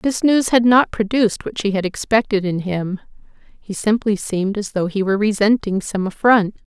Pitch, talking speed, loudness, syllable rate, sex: 210 Hz, 195 wpm, -18 LUFS, 5.3 syllables/s, female